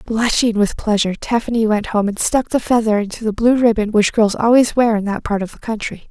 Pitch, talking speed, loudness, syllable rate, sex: 220 Hz, 235 wpm, -17 LUFS, 5.7 syllables/s, female